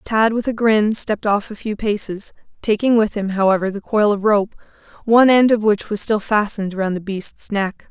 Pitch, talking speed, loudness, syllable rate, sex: 210 Hz, 210 wpm, -18 LUFS, 5.3 syllables/s, female